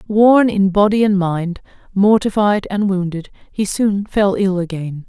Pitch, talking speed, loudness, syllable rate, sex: 195 Hz, 155 wpm, -16 LUFS, 4.1 syllables/s, female